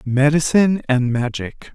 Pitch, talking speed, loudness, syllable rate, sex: 140 Hz, 105 wpm, -17 LUFS, 4.5 syllables/s, male